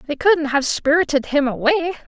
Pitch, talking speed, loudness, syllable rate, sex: 300 Hz, 170 wpm, -18 LUFS, 5.7 syllables/s, female